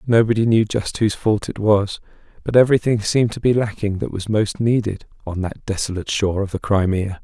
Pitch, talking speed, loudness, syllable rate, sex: 105 Hz, 200 wpm, -19 LUFS, 5.8 syllables/s, male